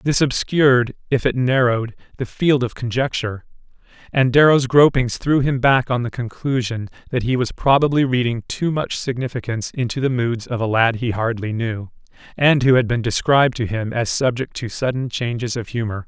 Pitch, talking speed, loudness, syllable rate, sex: 125 Hz, 185 wpm, -19 LUFS, 5.3 syllables/s, male